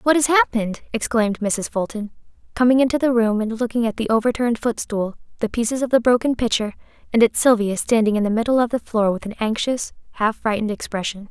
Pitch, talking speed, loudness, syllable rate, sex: 230 Hz, 200 wpm, -20 LUFS, 6.2 syllables/s, female